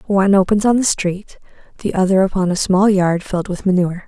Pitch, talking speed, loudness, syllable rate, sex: 190 Hz, 205 wpm, -16 LUFS, 6.1 syllables/s, female